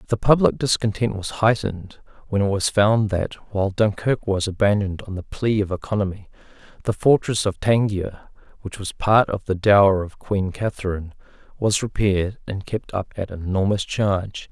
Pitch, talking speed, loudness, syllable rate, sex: 100 Hz, 170 wpm, -21 LUFS, 5.2 syllables/s, male